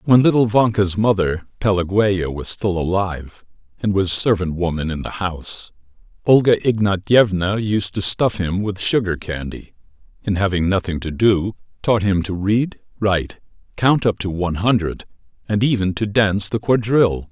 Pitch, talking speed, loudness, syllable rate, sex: 100 Hz, 155 wpm, -19 LUFS, 4.8 syllables/s, male